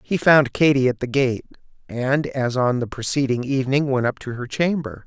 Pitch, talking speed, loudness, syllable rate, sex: 130 Hz, 200 wpm, -20 LUFS, 5.1 syllables/s, male